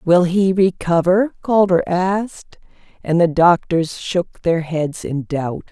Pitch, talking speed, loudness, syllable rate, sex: 175 Hz, 135 wpm, -17 LUFS, 3.6 syllables/s, female